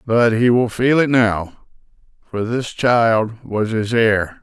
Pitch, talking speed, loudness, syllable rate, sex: 115 Hz, 165 wpm, -17 LUFS, 3.4 syllables/s, male